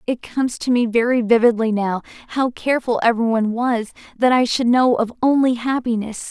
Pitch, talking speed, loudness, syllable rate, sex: 235 Hz, 180 wpm, -18 LUFS, 5.6 syllables/s, female